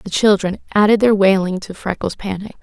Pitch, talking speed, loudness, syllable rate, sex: 200 Hz, 185 wpm, -16 LUFS, 5.4 syllables/s, female